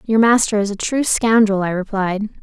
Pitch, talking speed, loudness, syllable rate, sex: 210 Hz, 200 wpm, -17 LUFS, 5.0 syllables/s, female